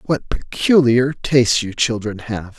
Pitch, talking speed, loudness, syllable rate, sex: 120 Hz, 140 wpm, -17 LUFS, 4.0 syllables/s, male